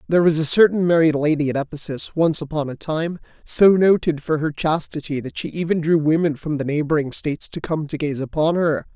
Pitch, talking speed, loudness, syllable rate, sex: 155 Hz, 215 wpm, -20 LUFS, 5.7 syllables/s, male